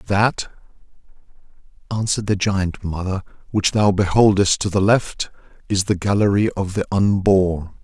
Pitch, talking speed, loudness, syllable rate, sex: 100 Hz, 130 wpm, -19 LUFS, 4.6 syllables/s, male